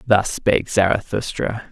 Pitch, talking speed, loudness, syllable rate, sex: 105 Hz, 105 wpm, -20 LUFS, 4.6 syllables/s, male